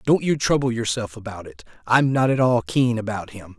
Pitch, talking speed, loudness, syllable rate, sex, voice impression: 120 Hz, 200 wpm, -21 LUFS, 5.3 syllables/s, male, masculine, adult-like, slightly middle-aged, slightly thick, tensed, slightly powerful, bright, hard, clear, fluent, slightly raspy, cool, very intellectual, refreshing, sincere, very calm, slightly mature, friendly, reassuring, slightly unique, slightly wild, slightly sweet, lively, slightly strict, slightly intense